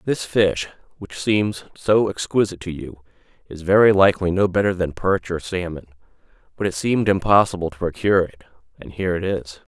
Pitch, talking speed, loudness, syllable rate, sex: 95 Hz, 170 wpm, -20 LUFS, 5.7 syllables/s, male